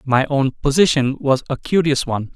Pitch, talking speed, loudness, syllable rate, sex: 140 Hz, 180 wpm, -18 LUFS, 5.1 syllables/s, male